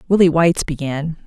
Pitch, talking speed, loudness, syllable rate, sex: 160 Hz, 140 wpm, -17 LUFS, 5.8 syllables/s, female